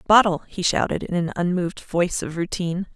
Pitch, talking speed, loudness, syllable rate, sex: 180 Hz, 185 wpm, -23 LUFS, 6.0 syllables/s, female